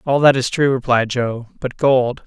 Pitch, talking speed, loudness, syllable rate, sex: 130 Hz, 210 wpm, -17 LUFS, 4.4 syllables/s, male